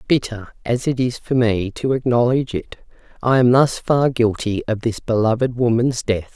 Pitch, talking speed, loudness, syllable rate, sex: 120 Hz, 180 wpm, -19 LUFS, 4.8 syllables/s, female